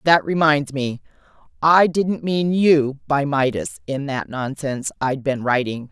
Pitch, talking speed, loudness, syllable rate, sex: 145 Hz, 150 wpm, -20 LUFS, 4.0 syllables/s, female